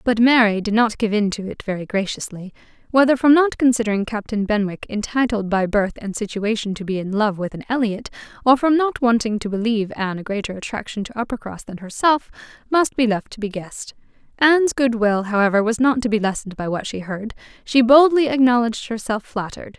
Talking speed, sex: 210 wpm, female